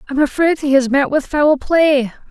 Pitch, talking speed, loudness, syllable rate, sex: 285 Hz, 210 wpm, -15 LUFS, 4.6 syllables/s, female